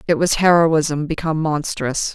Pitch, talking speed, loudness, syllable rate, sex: 160 Hz, 140 wpm, -18 LUFS, 4.5 syllables/s, female